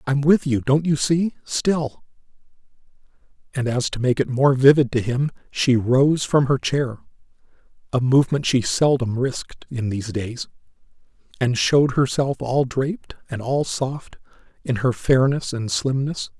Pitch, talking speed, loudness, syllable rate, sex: 135 Hz, 140 wpm, -20 LUFS, 4.4 syllables/s, male